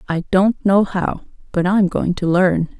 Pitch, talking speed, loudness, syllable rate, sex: 185 Hz, 170 wpm, -17 LUFS, 4.1 syllables/s, female